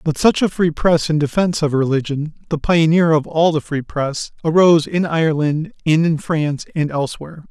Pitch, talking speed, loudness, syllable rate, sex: 155 Hz, 190 wpm, -17 LUFS, 4.6 syllables/s, male